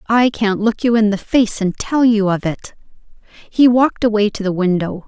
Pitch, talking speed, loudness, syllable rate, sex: 215 Hz, 215 wpm, -16 LUFS, 5.0 syllables/s, female